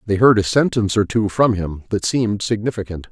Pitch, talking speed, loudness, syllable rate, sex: 105 Hz, 210 wpm, -18 LUFS, 6.0 syllables/s, male